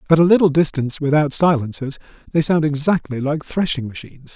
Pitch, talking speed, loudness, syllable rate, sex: 150 Hz, 165 wpm, -18 LUFS, 6.1 syllables/s, male